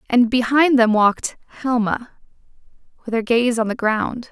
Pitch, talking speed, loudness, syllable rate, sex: 235 Hz, 140 wpm, -18 LUFS, 4.8 syllables/s, female